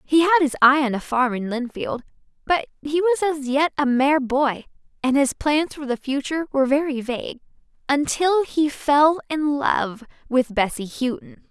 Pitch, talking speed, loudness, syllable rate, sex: 280 Hz, 175 wpm, -21 LUFS, 4.7 syllables/s, female